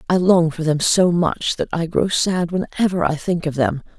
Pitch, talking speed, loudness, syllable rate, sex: 165 Hz, 225 wpm, -19 LUFS, 4.7 syllables/s, male